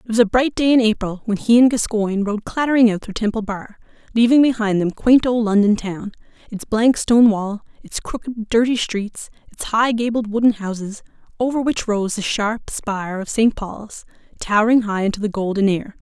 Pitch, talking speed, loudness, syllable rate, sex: 220 Hz, 195 wpm, -18 LUFS, 5.2 syllables/s, female